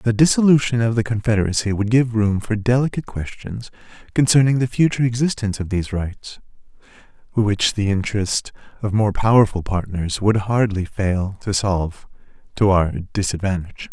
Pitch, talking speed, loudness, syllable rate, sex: 105 Hz, 140 wpm, -19 LUFS, 5.4 syllables/s, male